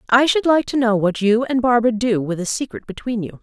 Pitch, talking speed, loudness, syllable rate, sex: 230 Hz, 265 wpm, -18 LUFS, 5.9 syllables/s, female